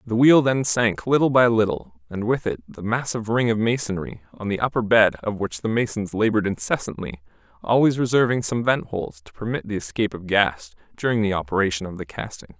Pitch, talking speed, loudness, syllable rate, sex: 105 Hz, 200 wpm, -22 LUFS, 5.8 syllables/s, male